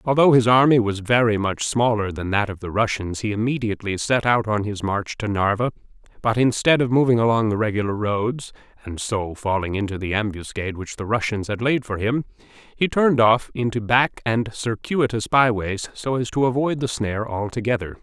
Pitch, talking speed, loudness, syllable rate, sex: 110 Hz, 195 wpm, -21 LUFS, 5.4 syllables/s, male